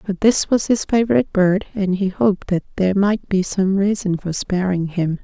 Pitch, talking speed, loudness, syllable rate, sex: 190 Hz, 205 wpm, -19 LUFS, 5.1 syllables/s, female